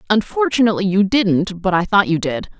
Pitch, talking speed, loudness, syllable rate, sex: 195 Hz, 185 wpm, -17 LUFS, 5.6 syllables/s, female